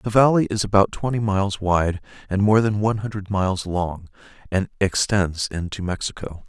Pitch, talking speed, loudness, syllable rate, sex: 100 Hz, 165 wpm, -21 LUFS, 5.1 syllables/s, male